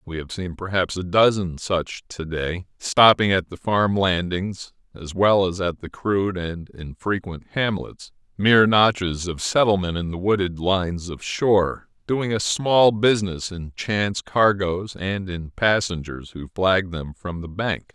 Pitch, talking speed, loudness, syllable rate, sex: 95 Hz, 155 wpm, -22 LUFS, 4.2 syllables/s, male